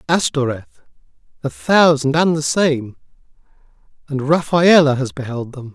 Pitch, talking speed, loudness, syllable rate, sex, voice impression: 145 Hz, 105 wpm, -16 LUFS, 4.4 syllables/s, male, masculine, adult-like, slightly thick, slightly refreshing, sincere, slightly calm